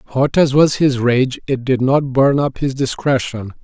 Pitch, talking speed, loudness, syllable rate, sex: 135 Hz, 200 wpm, -16 LUFS, 4.1 syllables/s, male